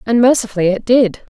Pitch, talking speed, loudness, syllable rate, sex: 225 Hz, 180 wpm, -14 LUFS, 6.1 syllables/s, female